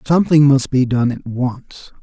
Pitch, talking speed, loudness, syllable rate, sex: 135 Hz, 175 wpm, -15 LUFS, 4.3 syllables/s, male